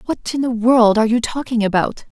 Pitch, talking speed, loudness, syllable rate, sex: 235 Hz, 220 wpm, -17 LUFS, 5.6 syllables/s, female